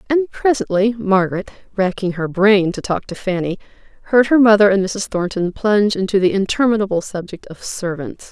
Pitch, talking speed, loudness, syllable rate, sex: 200 Hz, 165 wpm, -17 LUFS, 5.3 syllables/s, female